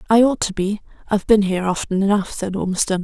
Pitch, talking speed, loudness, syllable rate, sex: 200 Hz, 220 wpm, -19 LUFS, 6.7 syllables/s, female